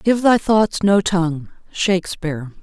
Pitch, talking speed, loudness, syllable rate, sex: 185 Hz, 135 wpm, -18 LUFS, 4.3 syllables/s, female